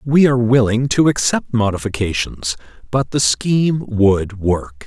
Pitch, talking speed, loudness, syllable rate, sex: 115 Hz, 135 wpm, -17 LUFS, 4.3 syllables/s, male